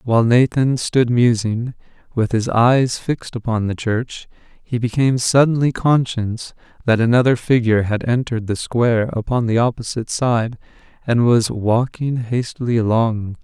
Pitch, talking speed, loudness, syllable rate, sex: 120 Hz, 140 wpm, -18 LUFS, 4.7 syllables/s, male